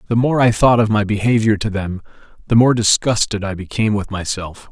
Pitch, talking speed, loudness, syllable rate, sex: 110 Hz, 205 wpm, -16 LUFS, 5.7 syllables/s, male